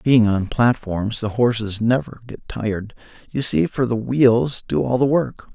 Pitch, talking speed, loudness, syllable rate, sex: 115 Hz, 185 wpm, -20 LUFS, 4.2 syllables/s, male